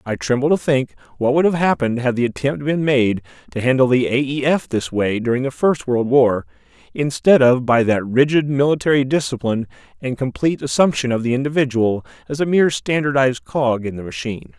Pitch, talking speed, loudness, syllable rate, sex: 130 Hz, 195 wpm, -18 LUFS, 5.7 syllables/s, male